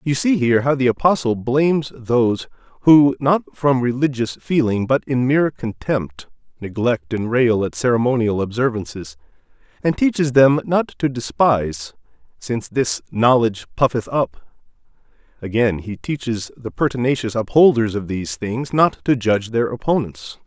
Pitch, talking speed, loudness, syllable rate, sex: 120 Hz, 140 wpm, -18 LUFS, 4.8 syllables/s, male